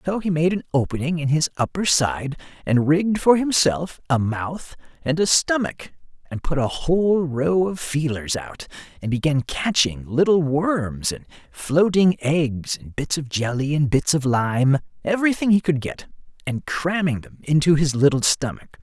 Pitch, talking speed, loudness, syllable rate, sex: 150 Hz, 165 wpm, -21 LUFS, 4.5 syllables/s, male